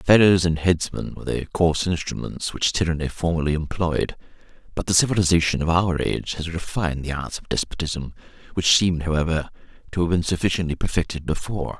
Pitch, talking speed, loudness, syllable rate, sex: 85 Hz, 165 wpm, -22 LUFS, 6.1 syllables/s, male